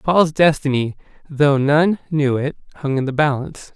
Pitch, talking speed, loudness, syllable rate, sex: 145 Hz, 160 wpm, -18 LUFS, 4.7 syllables/s, male